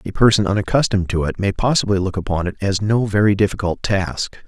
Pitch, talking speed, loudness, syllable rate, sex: 100 Hz, 200 wpm, -18 LUFS, 6.1 syllables/s, male